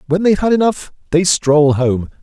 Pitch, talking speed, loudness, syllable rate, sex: 165 Hz, 215 wpm, -14 LUFS, 5.1 syllables/s, male